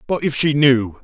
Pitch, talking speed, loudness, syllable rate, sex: 140 Hz, 230 wpm, -16 LUFS, 4.6 syllables/s, male